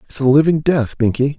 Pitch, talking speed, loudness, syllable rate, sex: 140 Hz, 215 wpm, -15 LUFS, 5.4 syllables/s, male